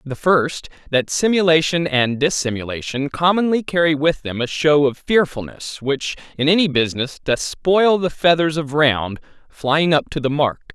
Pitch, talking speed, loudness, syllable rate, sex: 150 Hz, 160 wpm, -18 LUFS, 4.6 syllables/s, male